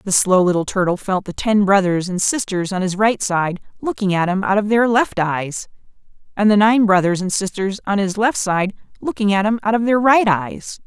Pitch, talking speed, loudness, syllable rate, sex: 200 Hz, 220 wpm, -17 LUFS, 5.1 syllables/s, female